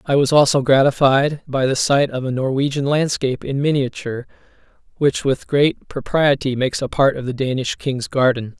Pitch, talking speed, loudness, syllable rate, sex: 135 Hz, 175 wpm, -18 LUFS, 5.2 syllables/s, male